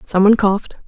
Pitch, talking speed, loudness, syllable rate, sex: 200 Hz, 205 wpm, -15 LUFS, 7.4 syllables/s, female